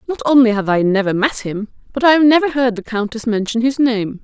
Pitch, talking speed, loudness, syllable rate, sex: 235 Hz, 240 wpm, -15 LUFS, 5.7 syllables/s, female